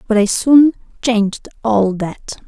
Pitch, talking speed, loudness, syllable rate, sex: 220 Hz, 145 wpm, -15 LUFS, 4.0 syllables/s, female